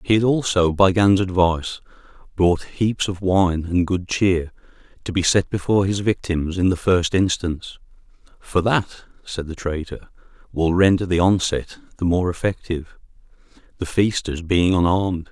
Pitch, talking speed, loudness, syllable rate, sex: 90 Hz, 155 wpm, -20 LUFS, 4.7 syllables/s, male